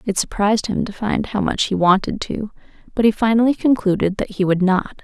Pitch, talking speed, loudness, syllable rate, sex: 205 Hz, 215 wpm, -18 LUFS, 5.6 syllables/s, female